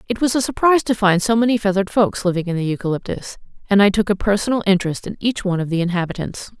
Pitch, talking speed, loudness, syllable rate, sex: 200 Hz, 235 wpm, -18 LUFS, 7.2 syllables/s, female